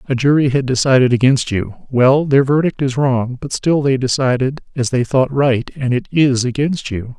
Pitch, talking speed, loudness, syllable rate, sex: 130 Hz, 200 wpm, -16 LUFS, 4.9 syllables/s, male